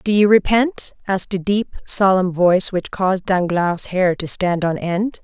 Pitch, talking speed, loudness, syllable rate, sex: 190 Hz, 185 wpm, -18 LUFS, 4.5 syllables/s, female